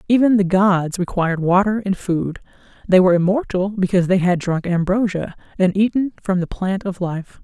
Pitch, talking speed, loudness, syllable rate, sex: 190 Hz, 175 wpm, -18 LUFS, 5.3 syllables/s, female